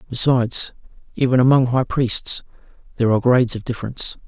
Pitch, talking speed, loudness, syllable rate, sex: 125 Hz, 140 wpm, -19 LUFS, 6.6 syllables/s, male